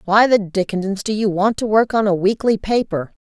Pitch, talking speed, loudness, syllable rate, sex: 205 Hz, 225 wpm, -18 LUFS, 5.3 syllables/s, female